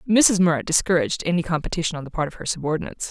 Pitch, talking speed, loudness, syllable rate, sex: 165 Hz, 210 wpm, -22 LUFS, 7.9 syllables/s, female